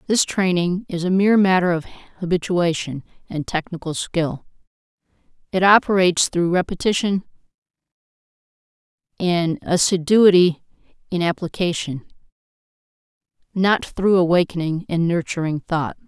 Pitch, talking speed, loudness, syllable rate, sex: 175 Hz, 95 wpm, -19 LUFS, 4.7 syllables/s, female